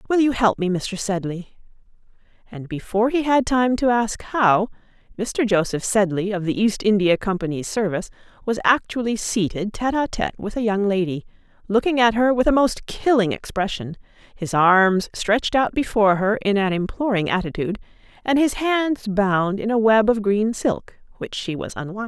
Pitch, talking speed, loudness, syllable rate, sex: 210 Hz, 175 wpm, -21 LUFS, 5.1 syllables/s, female